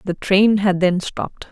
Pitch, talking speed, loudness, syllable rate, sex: 190 Hz, 200 wpm, -17 LUFS, 4.4 syllables/s, female